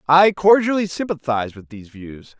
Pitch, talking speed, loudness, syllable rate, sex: 155 Hz, 150 wpm, -17 LUFS, 5.4 syllables/s, male